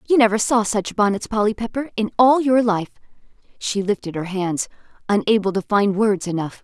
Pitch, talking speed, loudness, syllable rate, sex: 210 Hz, 180 wpm, -20 LUFS, 5.3 syllables/s, female